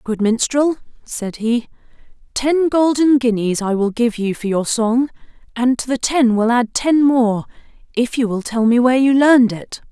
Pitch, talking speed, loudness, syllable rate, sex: 245 Hz, 190 wpm, -16 LUFS, 4.6 syllables/s, female